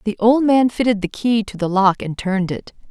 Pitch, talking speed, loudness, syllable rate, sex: 210 Hz, 250 wpm, -18 LUFS, 5.4 syllables/s, female